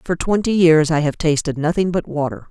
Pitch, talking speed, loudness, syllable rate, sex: 160 Hz, 215 wpm, -17 LUFS, 5.4 syllables/s, female